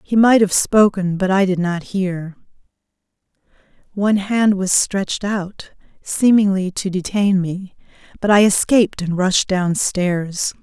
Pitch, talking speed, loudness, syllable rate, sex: 190 Hz, 135 wpm, -17 LUFS, 4.0 syllables/s, female